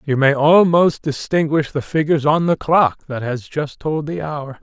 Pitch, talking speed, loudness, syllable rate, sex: 150 Hz, 195 wpm, -17 LUFS, 4.4 syllables/s, male